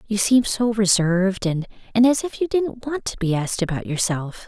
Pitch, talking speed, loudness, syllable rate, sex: 210 Hz, 200 wpm, -21 LUFS, 5.2 syllables/s, female